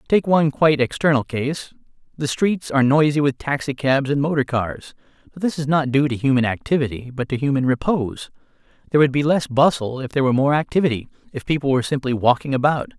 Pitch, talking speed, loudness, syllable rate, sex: 140 Hz, 190 wpm, -20 LUFS, 6.3 syllables/s, male